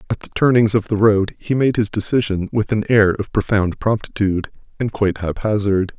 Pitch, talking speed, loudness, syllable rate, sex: 105 Hz, 190 wpm, -18 LUFS, 4.9 syllables/s, male